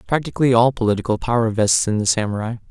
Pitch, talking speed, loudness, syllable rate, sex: 115 Hz, 175 wpm, -18 LUFS, 6.9 syllables/s, male